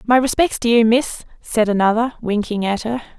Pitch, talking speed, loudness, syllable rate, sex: 230 Hz, 190 wpm, -18 LUFS, 5.2 syllables/s, female